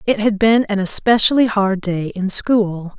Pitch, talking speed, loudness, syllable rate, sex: 205 Hz, 180 wpm, -16 LUFS, 4.2 syllables/s, female